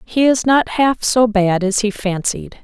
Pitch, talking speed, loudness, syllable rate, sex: 225 Hz, 205 wpm, -16 LUFS, 4.0 syllables/s, female